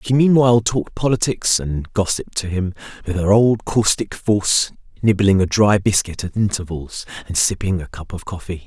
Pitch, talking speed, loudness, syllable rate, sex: 100 Hz, 175 wpm, -18 LUFS, 5.1 syllables/s, male